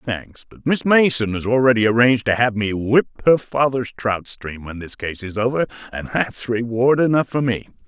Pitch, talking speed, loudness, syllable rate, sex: 120 Hz, 200 wpm, -19 LUFS, 5.1 syllables/s, male